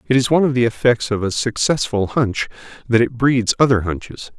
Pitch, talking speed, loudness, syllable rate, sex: 120 Hz, 205 wpm, -18 LUFS, 5.7 syllables/s, male